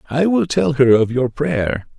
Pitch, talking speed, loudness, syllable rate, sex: 140 Hz, 210 wpm, -17 LUFS, 4.1 syllables/s, male